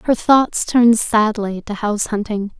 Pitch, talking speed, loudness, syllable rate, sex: 215 Hz, 160 wpm, -16 LUFS, 4.4 syllables/s, female